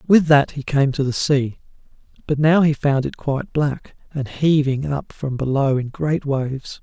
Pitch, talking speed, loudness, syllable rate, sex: 140 Hz, 195 wpm, -19 LUFS, 4.4 syllables/s, male